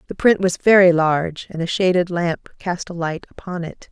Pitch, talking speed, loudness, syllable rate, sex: 175 Hz, 215 wpm, -19 LUFS, 5.0 syllables/s, female